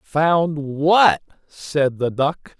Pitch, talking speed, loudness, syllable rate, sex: 150 Hz, 115 wpm, -19 LUFS, 2.2 syllables/s, male